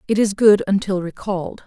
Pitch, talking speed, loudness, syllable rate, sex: 195 Hz, 180 wpm, -18 LUFS, 5.4 syllables/s, female